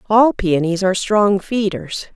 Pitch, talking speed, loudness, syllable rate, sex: 195 Hz, 140 wpm, -17 LUFS, 4.3 syllables/s, female